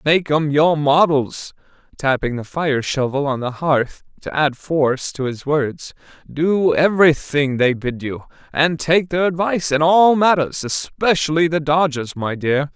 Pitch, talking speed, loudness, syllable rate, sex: 150 Hz, 155 wpm, -18 LUFS, 4.2 syllables/s, male